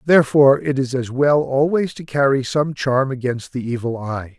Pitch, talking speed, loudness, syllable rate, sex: 135 Hz, 190 wpm, -18 LUFS, 4.9 syllables/s, male